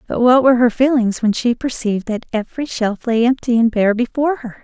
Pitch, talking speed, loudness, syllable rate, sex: 235 Hz, 220 wpm, -16 LUFS, 6.0 syllables/s, female